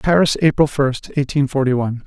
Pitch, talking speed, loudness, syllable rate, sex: 140 Hz, 175 wpm, -17 LUFS, 5.6 syllables/s, male